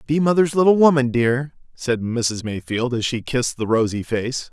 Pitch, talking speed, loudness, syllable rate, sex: 130 Hz, 185 wpm, -19 LUFS, 4.8 syllables/s, male